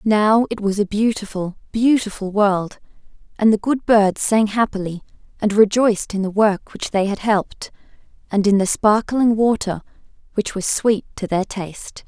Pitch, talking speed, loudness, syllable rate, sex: 210 Hz, 165 wpm, -19 LUFS, 4.7 syllables/s, female